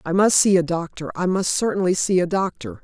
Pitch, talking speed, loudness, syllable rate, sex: 185 Hz, 235 wpm, -20 LUFS, 5.6 syllables/s, female